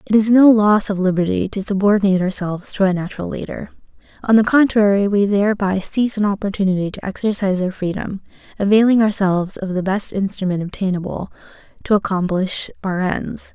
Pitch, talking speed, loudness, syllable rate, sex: 200 Hz, 160 wpm, -18 LUFS, 6.0 syllables/s, female